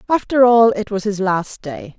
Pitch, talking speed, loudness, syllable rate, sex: 205 Hz, 210 wpm, -16 LUFS, 4.5 syllables/s, female